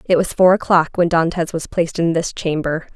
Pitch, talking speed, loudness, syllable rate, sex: 170 Hz, 225 wpm, -17 LUFS, 5.6 syllables/s, female